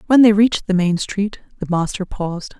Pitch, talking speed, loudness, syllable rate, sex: 195 Hz, 210 wpm, -18 LUFS, 5.4 syllables/s, female